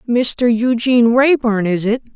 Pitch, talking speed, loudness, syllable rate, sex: 235 Hz, 140 wpm, -15 LUFS, 4.3 syllables/s, female